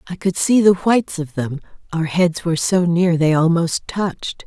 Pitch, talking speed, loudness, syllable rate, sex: 170 Hz, 200 wpm, -18 LUFS, 4.8 syllables/s, female